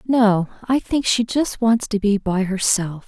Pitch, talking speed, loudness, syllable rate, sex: 215 Hz, 195 wpm, -19 LUFS, 3.9 syllables/s, female